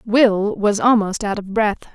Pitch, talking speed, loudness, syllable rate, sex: 210 Hz, 185 wpm, -18 LUFS, 4.1 syllables/s, female